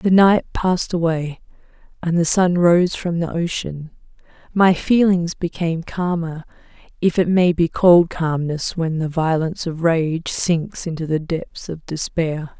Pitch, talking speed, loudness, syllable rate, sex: 170 Hz, 150 wpm, -19 LUFS, 4.2 syllables/s, female